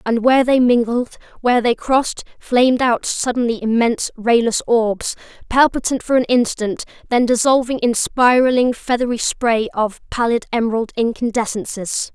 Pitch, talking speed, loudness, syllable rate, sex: 240 Hz, 135 wpm, -17 LUFS, 4.9 syllables/s, female